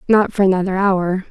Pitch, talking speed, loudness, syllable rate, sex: 190 Hz, 185 wpm, -16 LUFS, 5.4 syllables/s, female